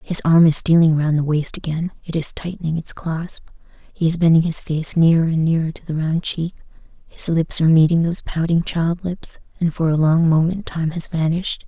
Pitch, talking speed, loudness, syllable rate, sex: 165 Hz, 210 wpm, -19 LUFS, 5.3 syllables/s, female